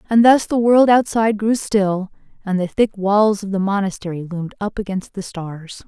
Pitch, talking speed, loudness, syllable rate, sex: 200 Hz, 195 wpm, -18 LUFS, 5.0 syllables/s, female